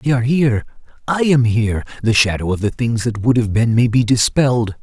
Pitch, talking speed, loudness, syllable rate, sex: 120 Hz, 200 wpm, -16 LUFS, 5.9 syllables/s, male